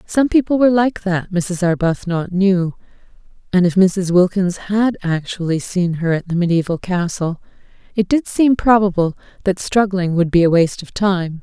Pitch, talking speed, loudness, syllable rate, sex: 185 Hz, 170 wpm, -17 LUFS, 4.8 syllables/s, female